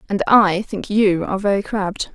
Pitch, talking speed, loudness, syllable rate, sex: 195 Hz, 195 wpm, -18 LUFS, 5.2 syllables/s, female